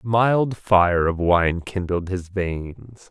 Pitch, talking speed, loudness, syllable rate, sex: 95 Hz, 135 wpm, -21 LUFS, 2.7 syllables/s, male